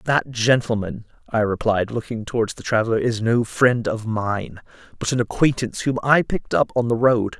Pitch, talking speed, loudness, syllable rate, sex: 115 Hz, 185 wpm, -21 LUFS, 5.1 syllables/s, male